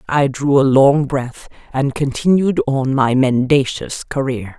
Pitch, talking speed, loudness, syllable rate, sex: 135 Hz, 145 wpm, -16 LUFS, 3.8 syllables/s, female